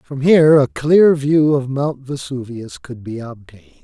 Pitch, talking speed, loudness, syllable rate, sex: 135 Hz, 170 wpm, -15 LUFS, 4.5 syllables/s, male